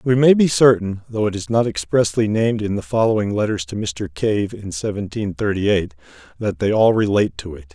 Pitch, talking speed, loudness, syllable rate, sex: 110 Hz, 210 wpm, -19 LUFS, 5.6 syllables/s, male